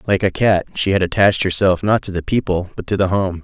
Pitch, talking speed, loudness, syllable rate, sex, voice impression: 95 Hz, 260 wpm, -17 LUFS, 6.0 syllables/s, male, masculine, adult-like, clear, fluent, cool, intellectual, slightly mature, wild, slightly strict, slightly sharp